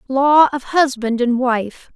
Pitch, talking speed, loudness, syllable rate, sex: 260 Hz, 155 wpm, -16 LUFS, 3.4 syllables/s, female